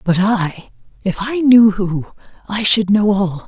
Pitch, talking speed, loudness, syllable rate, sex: 200 Hz, 155 wpm, -15 LUFS, 3.8 syllables/s, female